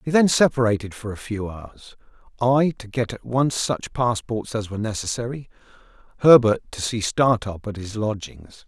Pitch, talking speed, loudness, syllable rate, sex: 115 Hz, 165 wpm, -22 LUFS, 4.9 syllables/s, male